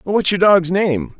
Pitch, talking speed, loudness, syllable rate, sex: 180 Hz, 200 wpm, -15 LUFS, 3.7 syllables/s, male